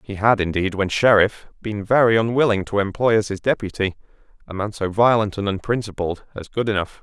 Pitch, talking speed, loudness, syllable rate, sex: 105 Hz, 180 wpm, -20 LUFS, 5.8 syllables/s, male